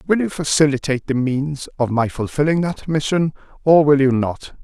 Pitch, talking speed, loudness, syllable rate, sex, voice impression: 145 Hz, 180 wpm, -18 LUFS, 5.2 syllables/s, male, masculine, middle-aged, slightly bright, slightly halting, slightly sincere, slightly mature, friendly, slightly reassuring, kind